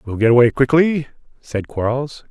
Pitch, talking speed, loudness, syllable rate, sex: 130 Hz, 155 wpm, -17 LUFS, 5.0 syllables/s, male